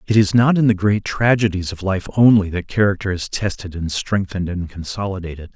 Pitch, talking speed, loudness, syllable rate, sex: 95 Hz, 195 wpm, -18 LUFS, 5.7 syllables/s, male